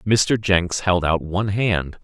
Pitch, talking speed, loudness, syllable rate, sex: 95 Hz, 175 wpm, -20 LUFS, 3.5 syllables/s, male